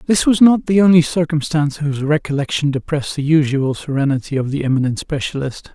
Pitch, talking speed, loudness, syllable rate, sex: 150 Hz, 165 wpm, -17 LUFS, 6.1 syllables/s, male